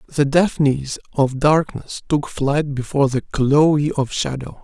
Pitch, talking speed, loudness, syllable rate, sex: 140 Hz, 140 wpm, -19 LUFS, 3.8 syllables/s, male